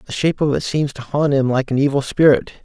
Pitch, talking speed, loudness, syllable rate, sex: 135 Hz, 275 wpm, -17 LUFS, 6.3 syllables/s, male